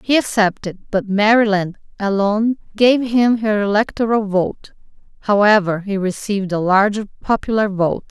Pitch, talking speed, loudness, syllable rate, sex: 210 Hz, 125 wpm, -17 LUFS, 4.8 syllables/s, female